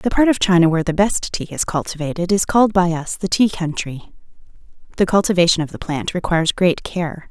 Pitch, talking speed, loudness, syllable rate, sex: 175 Hz, 205 wpm, -18 LUFS, 5.8 syllables/s, female